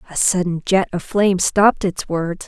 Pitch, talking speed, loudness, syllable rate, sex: 185 Hz, 195 wpm, -18 LUFS, 4.9 syllables/s, female